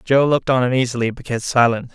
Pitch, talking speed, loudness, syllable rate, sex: 125 Hz, 215 wpm, -18 LUFS, 6.5 syllables/s, male